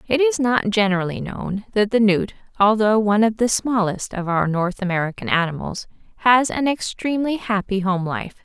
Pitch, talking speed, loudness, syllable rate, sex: 210 Hz, 170 wpm, -20 LUFS, 5.2 syllables/s, female